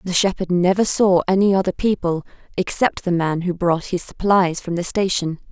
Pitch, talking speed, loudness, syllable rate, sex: 185 Hz, 185 wpm, -19 LUFS, 5.1 syllables/s, female